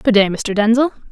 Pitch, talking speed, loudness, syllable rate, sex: 225 Hz, 215 wpm, -16 LUFS, 5.4 syllables/s, female